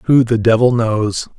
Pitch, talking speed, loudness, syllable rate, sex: 115 Hz, 175 wpm, -14 LUFS, 3.9 syllables/s, male